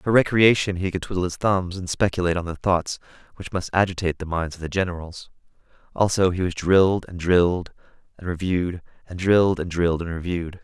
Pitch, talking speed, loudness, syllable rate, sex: 90 Hz, 190 wpm, -22 LUFS, 6.1 syllables/s, male